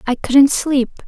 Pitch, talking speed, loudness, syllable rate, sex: 270 Hz, 165 wpm, -14 LUFS, 3.8 syllables/s, female